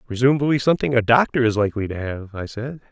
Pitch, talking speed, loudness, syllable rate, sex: 120 Hz, 205 wpm, -20 LUFS, 6.7 syllables/s, male